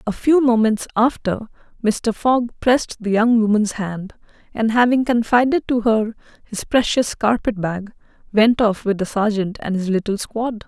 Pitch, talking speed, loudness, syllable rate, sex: 220 Hz, 165 wpm, -19 LUFS, 4.5 syllables/s, female